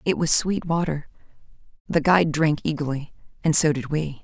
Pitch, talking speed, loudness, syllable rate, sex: 155 Hz, 170 wpm, -22 LUFS, 5.3 syllables/s, female